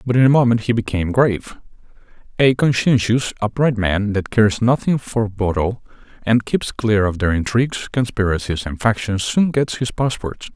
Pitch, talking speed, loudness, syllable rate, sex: 110 Hz, 165 wpm, -18 LUFS, 5.0 syllables/s, male